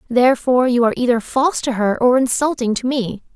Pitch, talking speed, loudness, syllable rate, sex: 245 Hz, 195 wpm, -17 LUFS, 6.3 syllables/s, female